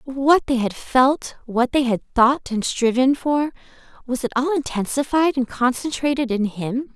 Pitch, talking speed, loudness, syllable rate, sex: 260 Hz, 145 wpm, -20 LUFS, 4.4 syllables/s, female